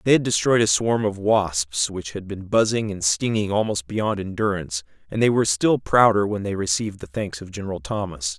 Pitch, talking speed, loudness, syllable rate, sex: 100 Hz, 210 wpm, -22 LUFS, 5.4 syllables/s, male